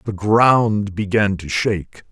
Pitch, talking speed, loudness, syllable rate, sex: 105 Hz, 140 wpm, -17 LUFS, 3.6 syllables/s, male